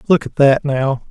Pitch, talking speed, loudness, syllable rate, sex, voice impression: 140 Hz, 215 wpm, -15 LUFS, 4.4 syllables/s, male, masculine, slightly middle-aged, soft, slightly muffled, slightly calm, friendly, slightly reassuring, slightly elegant